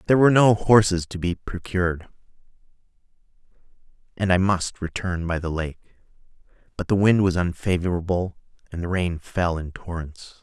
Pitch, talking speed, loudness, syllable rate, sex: 90 Hz, 145 wpm, -22 LUFS, 5.2 syllables/s, male